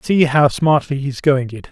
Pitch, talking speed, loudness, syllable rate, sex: 140 Hz, 210 wpm, -16 LUFS, 4.4 syllables/s, male